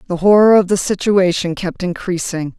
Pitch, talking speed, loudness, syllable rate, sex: 185 Hz, 160 wpm, -15 LUFS, 5.0 syllables/s, female